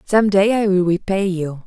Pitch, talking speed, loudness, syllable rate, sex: 190 Hz, 215 wpm, -17 LUFS, 4.5 syllables/s, female